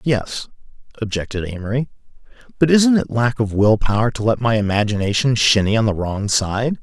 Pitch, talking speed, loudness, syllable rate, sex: 115 Hz, 165 wpm, -18 LUFS, 5.2 syllables/s, male